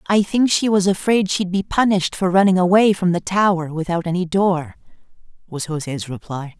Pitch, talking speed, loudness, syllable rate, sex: 180 Hz, 180 wpm, -18 LUFS, 5.2 syllables/s, male